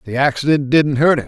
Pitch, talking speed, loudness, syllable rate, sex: 140 Hz, 235 wpm, -15 LUFS, 6.2 syllables/s, male